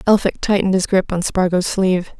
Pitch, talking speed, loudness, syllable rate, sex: 185 Hz, 190 wpm, -17 LUFS, 5.9 syllables/s, female